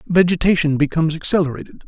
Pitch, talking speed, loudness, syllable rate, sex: 160 Hz, 95 wpm, -17 LUFS, 7.0 syllables/s, male